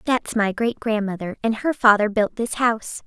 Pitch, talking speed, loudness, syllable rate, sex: 220 Hz, 195 wpm, -21 LUFS, 4.9 syllables/s, female